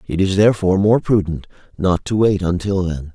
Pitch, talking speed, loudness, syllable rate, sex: 95 Hz, 190 wpm, -17 LUFS, 5.5 syllables/s, male